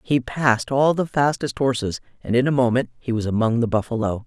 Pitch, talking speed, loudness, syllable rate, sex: 125 Hz, 210 wpm, -21 LUFS, 5.6 syllables/s, female